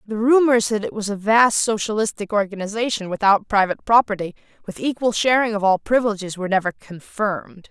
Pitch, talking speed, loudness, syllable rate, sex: 210 Hz, 165 wpm, -19 LUFS, 6.0 syllables/s, female